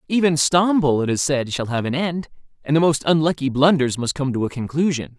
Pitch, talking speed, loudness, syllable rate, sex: 145 Hz, 220 wpm, -19 LUFS, 5.5 syllables/s, male